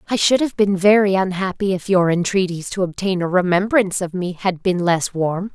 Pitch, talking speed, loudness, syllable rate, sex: 185 Hz, 205 wpm, -18 LUFS, 5.2 syllables/s, female